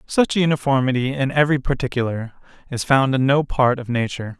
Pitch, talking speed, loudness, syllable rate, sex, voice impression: 130 Hz, 180 wpm, -19 LUFS, 6.1 syllables/s, male, very masculine, slightly adult-like, slightly thick, relaxed, slightly weak, bright, soft, clear, fluent, cool, very intellectual, refreshing, very sincere, very calm, slightly mature, friendly, reassuring, slightly unique, slightly elegant, wild, sweet, lively, kind, slightly modest